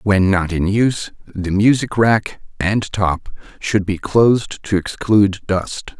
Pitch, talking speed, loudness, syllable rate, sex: 100 Hz, 150 wpm, -17 LUFS, 3.8 syllables/s, male